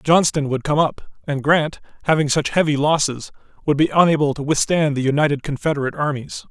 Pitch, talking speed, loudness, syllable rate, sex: 145 Hz, 175 wpm, -19 LUFS, 5.8 syllables/s, male